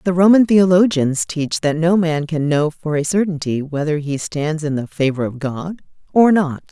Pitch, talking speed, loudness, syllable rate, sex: 160 Hz, 195 wpm, -17 LUFS, 4.7 syllables/s, female